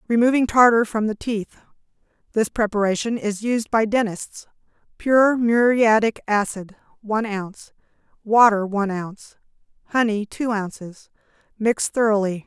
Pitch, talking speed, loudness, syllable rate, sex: 215 Hz, 110 wpm, -20 LUFS, 4.8 syllables/s, female